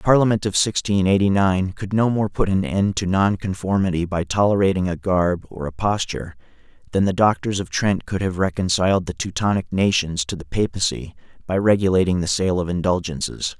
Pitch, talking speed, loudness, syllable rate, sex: 95 Hz, 180 wpm, -20 LUFS, 5.5 syllables/s, male